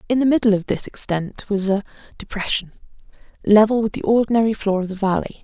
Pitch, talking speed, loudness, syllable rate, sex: 210 Hz, 190 wpm, -19 LUFS, 6.2 syllables/s, female